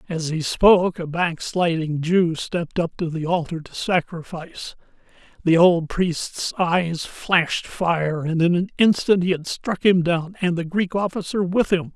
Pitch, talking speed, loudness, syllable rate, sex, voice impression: 175 Hz, 170 wpm, -21 LUFS, 4.2 syllables/s, male, very masculine, old, muffled, intellectual, slightly mature, wild, slightly lively